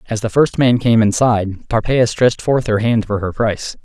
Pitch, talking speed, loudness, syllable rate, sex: 115 Hz, 220 wpm, -16 LUFS, 5.6 syllables/s, male